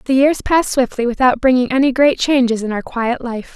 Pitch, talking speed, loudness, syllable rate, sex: 255 Hz, 220 wpm, -15 LUFS, 5.6 syllables/s, female